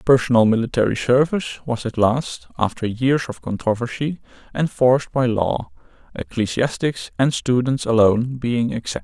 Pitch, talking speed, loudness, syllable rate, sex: 120 Hz, 125 wpm, -20 LUFS, 5.0 syllables/s, male